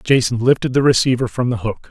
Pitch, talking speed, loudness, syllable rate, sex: 120 Hz, 220 wpm, -16 LUFS, 6.1 syllables/s, male